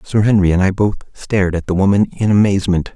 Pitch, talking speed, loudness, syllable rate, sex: 100 Hz, 225 wpm, -15 LUFS, 6.3 syllables/s, male